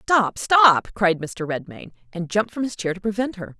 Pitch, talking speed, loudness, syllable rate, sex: 200 Hz, 215 wpm, -21 LUFS, 4.8 syllables/s, female